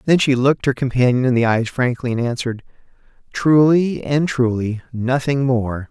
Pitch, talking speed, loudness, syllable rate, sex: 125 Hz, 165 wpm, -18 LUFS, 5.0 syllables/s, male